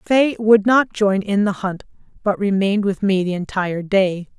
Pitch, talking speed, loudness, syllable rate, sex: 200 Hz, 190 wpm, -18 LUFS, 4.8 syllables/s, female